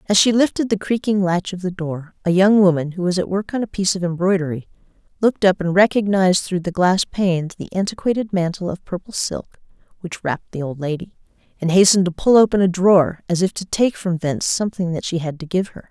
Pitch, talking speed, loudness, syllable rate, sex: 185 Hz, 225 wpm, -19 LUFS, 6.0 syllables/s, female